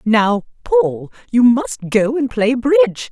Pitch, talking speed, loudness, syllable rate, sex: 215 Hz, 155 wpm, -16 LUFS, 3.5 syllables/s, female